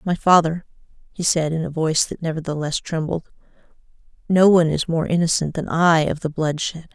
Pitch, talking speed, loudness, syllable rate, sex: 165 Hz, 180 wpm, -20 LUFS, 5.7 syllables/s, female